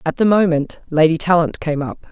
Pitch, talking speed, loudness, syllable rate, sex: 170 Hz, 200 wpm, -17 LUFS, 5.3 syllables/s, female